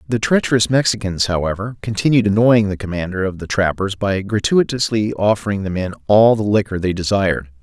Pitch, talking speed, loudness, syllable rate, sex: 100 Hz, 165 wpm, -17 LUFS, 5.7 syllables/s, male